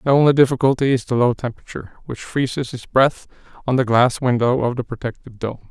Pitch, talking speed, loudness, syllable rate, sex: 125 Hz, 200 wpm, -19 LUFS, 6.2 syllables/s, male